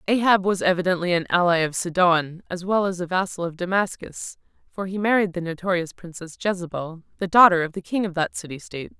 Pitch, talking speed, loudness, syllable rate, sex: 180 Hz, 200 wpm, -22 LUFS, 5.9 syllables/s, female